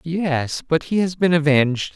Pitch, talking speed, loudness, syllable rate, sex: 160 Hz, 185 wpm, -19 LUFS, 4.5 syllables/s, male